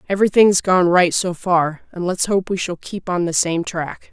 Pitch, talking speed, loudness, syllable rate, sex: 180 Hz, 220 wpm, -18 LUFS, 4.7 syllables/s, female